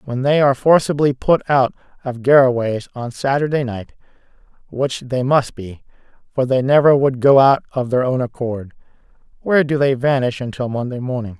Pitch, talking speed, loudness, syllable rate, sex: 130 Hz, 160 wpm, -17 LUFS, 5.2 syllables/s, male